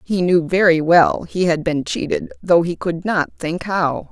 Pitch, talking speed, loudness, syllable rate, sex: 170 Hz, 205 wpm, -18 LUFS, 4.1 syllables/s, female